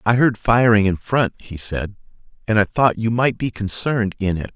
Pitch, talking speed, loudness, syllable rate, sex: 110 Hz, 210 wpm, -19 LUFS, 5.0 syllables/s, male